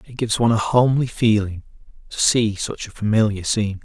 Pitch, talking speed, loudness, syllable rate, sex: 110 Hz, 190 wpm, -19 LUFS, 6.1 syllables/s, male